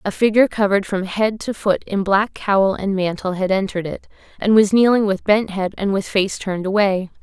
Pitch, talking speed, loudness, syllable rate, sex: 200 Hz, 215 wpm, -18 LUFS, 5.3 syllables/s, female